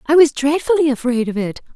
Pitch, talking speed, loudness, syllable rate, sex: 280 Hz, 205 wpm, -17 LUFS, 5.8 syllables/s, female